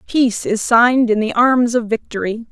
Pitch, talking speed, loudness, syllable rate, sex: 230 Hz, 190 wpm, -15 LUFS, 5.2 syllables/s, female